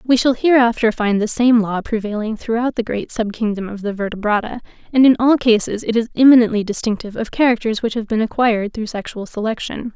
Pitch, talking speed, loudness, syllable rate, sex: 225 Hz, 200 wpm, -17 LUFS, 6.0 syllables/s, female